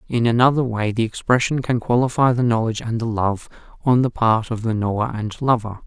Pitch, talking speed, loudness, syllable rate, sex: 115 Hz, 205 wpm, -20 LUFS, 5.7 syllables/s, male